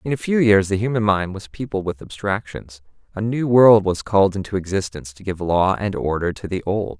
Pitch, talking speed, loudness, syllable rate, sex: 100 Hz, 225 wpm, -20 LUFS, 5.5 syllables/s, male